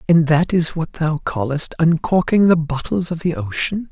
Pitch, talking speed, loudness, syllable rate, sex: 160 Hz, 185 wpm, -18 LUFS, 4.7 syllables/s, male